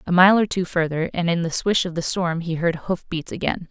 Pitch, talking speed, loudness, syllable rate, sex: 170 Hz, 260 wpm, -21 LUFS, 5.3 syllables/s, female